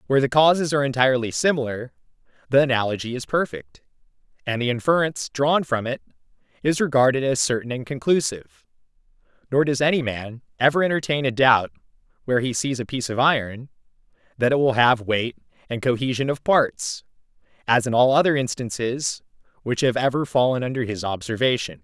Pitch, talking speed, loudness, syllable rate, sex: 125 Hz, 160 wpm, -21 LUFS, 5.9 syllables/s, male